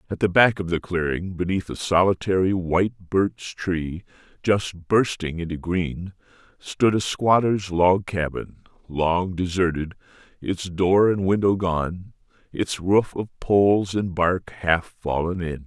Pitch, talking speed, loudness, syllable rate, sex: 90 Hz, 140 wpm, -22 LUFS, 3.9 syllables/s, male